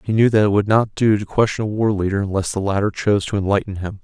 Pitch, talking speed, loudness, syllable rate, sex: 105 Hz, 285 wpm, -18 LUFS, 6.7 syllables/s, male